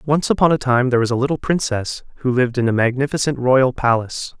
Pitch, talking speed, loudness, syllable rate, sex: 130 Hz, 220 wpm, -18 LUFS, 6.4 syllables/s, male